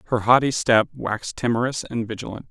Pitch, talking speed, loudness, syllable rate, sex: 120 Hz, 165 wpm, -21 LUFS, 6.1 syllables/s, male